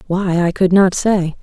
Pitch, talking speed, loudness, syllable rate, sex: 185 Hz, 210 wpm, -15 LUFS, 4.2 syllables/s, female